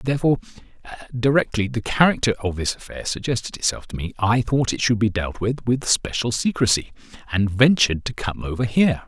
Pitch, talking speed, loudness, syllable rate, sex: 115 Hz, 180 wpm, -21 LUFS, 5.8 syllables/s, male